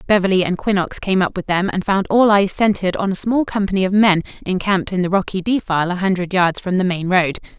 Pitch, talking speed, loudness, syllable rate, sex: 190 Hz, 235 wpm, -17 LUFS, 6.2 syllables/s, female